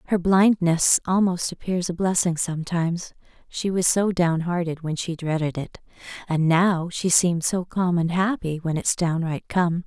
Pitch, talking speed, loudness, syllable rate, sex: 175 Hz, 165 wpm, -22 LUFS, 4.5 syllables/s, female